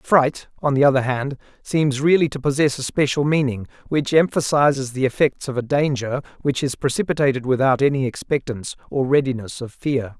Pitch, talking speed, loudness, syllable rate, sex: 135 Hz, 170 wpm, -20 LUFS, 5.4 syllables/s, male